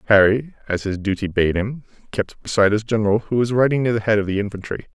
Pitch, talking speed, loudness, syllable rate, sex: 110 Hz, 230 wpm, -20 LUFS, 6.6 syllables/s, male